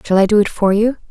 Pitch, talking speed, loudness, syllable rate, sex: 210 Hz, 325 wpm, -14 LUFS, 6.7 syllables/s, female